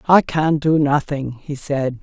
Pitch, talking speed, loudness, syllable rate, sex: 145 Hz, 175 wpm, -18 LUFS, 3.8 syllables/s, female